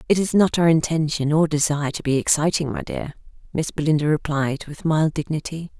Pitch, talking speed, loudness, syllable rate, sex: 155 Hz, 185 wpm, -21 LUFS, 5.6 syllables/s, female